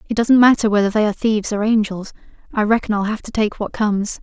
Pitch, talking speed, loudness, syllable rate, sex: 215 Hz, 240 wpm, -17 LUFS, 6.5 syllables/s, female